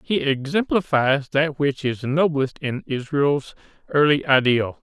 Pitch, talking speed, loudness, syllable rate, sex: 140 Hz, 120 wpm, -21 LUFS, 4.0 syllables/s, male